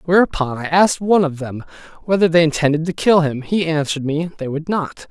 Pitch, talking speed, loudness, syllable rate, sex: 160 Hz, 210 wpm, -17 LUFS, 6.0 syllables/s, male